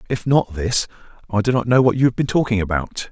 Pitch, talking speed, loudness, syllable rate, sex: 115 Hz, 250 wpm, -19 LUFS, 6.0 syllables/s, male